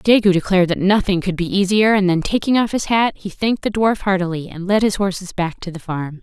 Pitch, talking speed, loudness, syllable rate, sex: 190 Hz, 250 wpm, -18 LUFS, 5.9 syllables/s, female